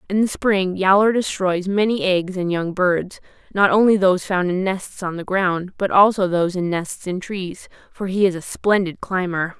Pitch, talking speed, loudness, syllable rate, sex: 190 Hz, 200 wpm, -19 LUFS, 4.7 syllables/s, female